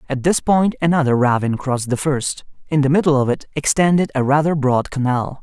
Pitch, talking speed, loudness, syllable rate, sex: 140 Hz, 200 wpm, -17 LUFS, 5.8 syllables/s, male